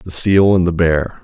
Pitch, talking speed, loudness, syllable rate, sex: 90 Hz, 245 wpm, -14 LUFS, 4.2 syllables/s, male